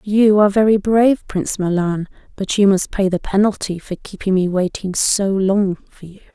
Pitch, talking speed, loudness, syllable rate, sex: 195 Hz, 190 wpm, -17 LUFS, 5.0 syllables/s, female